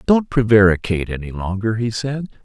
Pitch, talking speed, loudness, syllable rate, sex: 110 Hz, 150 wpm, -18 LUFS, 5.5 syllables/s, male